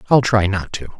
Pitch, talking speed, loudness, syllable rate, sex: 105 Hz, 240 wpm, -17 LUFS, 5.3 syllables/s, male